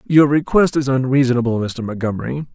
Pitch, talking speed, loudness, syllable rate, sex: 130 Hz, 140 wpm, -17 LUFS, 5.9 syllables/s, male